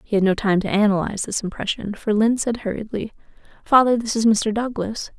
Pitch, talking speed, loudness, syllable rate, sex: 215 Hz, 195 wpm, -20 LUFS, 6.0 syllables/s, female